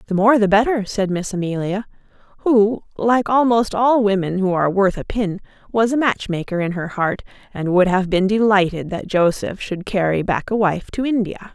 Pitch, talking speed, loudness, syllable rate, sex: 200 Hz, 195 wpm, -18 LUFS, 5.0 syllables/s, female